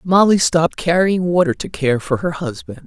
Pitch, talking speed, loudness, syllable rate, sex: 175 Hz, 190 wpm, -17 LUFS, 5.1 syllables/s, female